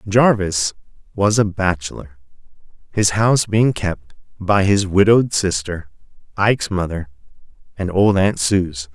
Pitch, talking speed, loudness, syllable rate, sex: 95 Hz, 120 wpm, -18 LUFS, 4.3 syllables/s, male